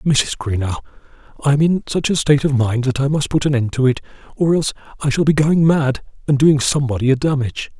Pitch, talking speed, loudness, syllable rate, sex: 140 Hz, 225 wpm, -17 LUFS, 6.0 syllables/s, male